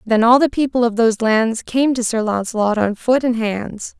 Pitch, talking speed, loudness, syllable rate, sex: 230 Hz, 225 wpm, -17 LUFS, 4.9 syllables/s, female